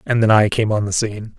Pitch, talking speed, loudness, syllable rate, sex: 110 Hz, 300 wpm, -17 LUFS, 6.4 syllables/s, male